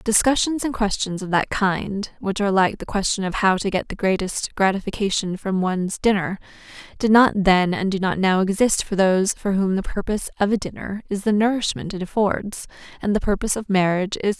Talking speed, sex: 215 wpm, female